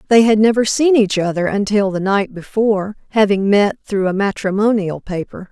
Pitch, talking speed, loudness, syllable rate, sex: 205 Hz, 175 wpm, -16 LUFS, 5.2 syllables/s, female